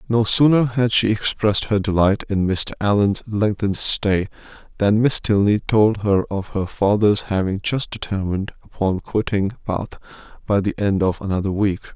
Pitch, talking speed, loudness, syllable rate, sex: 105 Hz, 160 wpm, -19 LUFS, 4.7 syllables/s, male